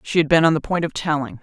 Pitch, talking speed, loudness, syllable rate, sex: 155 Hz, 335 wpm, -19 LUFS, 6.8 syllables/s, female